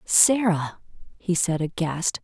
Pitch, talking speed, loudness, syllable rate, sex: 175 Hz, 105 wpm, -22 LUFS, 3.5 syllables/s, female